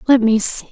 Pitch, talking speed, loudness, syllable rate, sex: 235 Hz, 250 wpm, -14 LUFS, 5.5 syllables/s, female